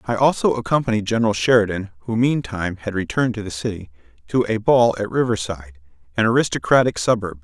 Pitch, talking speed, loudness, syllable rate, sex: 105 Hz, 135 wpm, -20 LUFS, 6.5 syllables/s, male